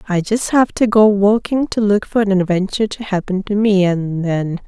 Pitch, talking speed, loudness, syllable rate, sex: 200 Hz, 220 wpm, -16 LUFS, 5.0 syllables/s, female